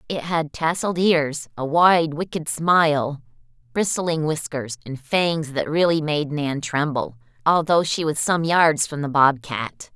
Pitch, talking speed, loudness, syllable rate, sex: 150 Hz, 150 wpm, -21 LUFS, 4.0 syllables/s, female